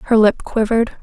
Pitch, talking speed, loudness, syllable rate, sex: 225 Hz, 175 wpm, -16 LUFS, 5.1 syllables/s, female